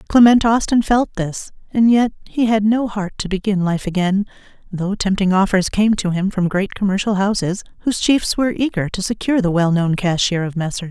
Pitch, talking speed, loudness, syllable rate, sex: 200 Hz, 195 wpm, -17 LUFS, 5.3 syllables/s, female